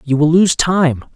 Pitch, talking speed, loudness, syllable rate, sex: 160 Hz, 210 wpm, -13 LUFS, 4.2 syllables/s, male